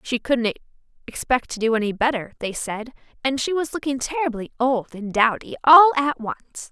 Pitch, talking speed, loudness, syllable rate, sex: 250 Hz, 180 wpm, -21 LUFS, 4.9 syllables/s, female